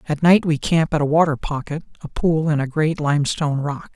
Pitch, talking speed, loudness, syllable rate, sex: 155 Hz, 230 wpm, -19 LUFS, 5.6 syllables/s, male